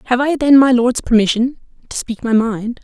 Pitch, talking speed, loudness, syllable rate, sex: 240 Hz, 210 wpm, -14 LUFS, 5.3 syllables/s, female